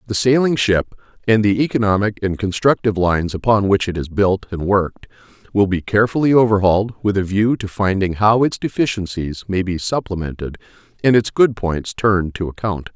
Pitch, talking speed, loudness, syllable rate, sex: 100 Hz, 175 wpm, -18 LUFS, 5.5 syllables/s, male